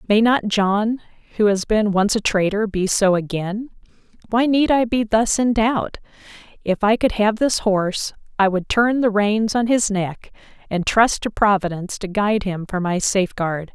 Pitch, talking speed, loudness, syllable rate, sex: 210 Hz, 180 wpm, -19 LUFS, 4.6 syllables/s, female